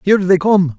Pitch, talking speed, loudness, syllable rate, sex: 185 Hz, 230 wpm, -13 LUFS, 5.8 syllables/s, male